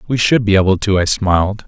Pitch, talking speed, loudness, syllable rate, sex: 100 Hz, 250 wpm, -14 LUFS, 6.0 syllables/s, male